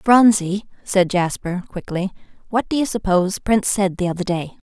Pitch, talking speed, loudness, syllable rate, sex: 195 Hz, 165 wpm, -20 LUFS, 5.1 syllables/s, female